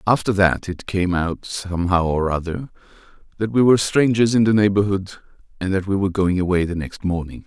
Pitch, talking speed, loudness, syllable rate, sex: 95 Hz, 195 wpm, -20 LUFS, 5.7 syllables/s, male